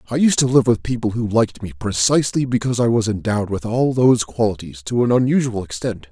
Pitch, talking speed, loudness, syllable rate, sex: 115 Hz, 215 wpm, -18 LUFS, 6.4 syllables/s, male